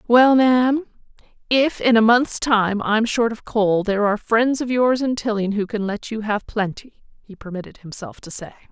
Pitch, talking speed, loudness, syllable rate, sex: 220 Hz, 200 wpm, -19 LUFS, 4.9 syllables/s, female